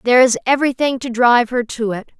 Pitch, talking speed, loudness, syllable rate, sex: 245 Hz, 220 wpm, -16 LUFS, 6.6 syllables/s, female